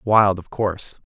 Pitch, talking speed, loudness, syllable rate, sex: 100 Hz, 170 wpm, -21 LUFS, 4.0 syllables/s, male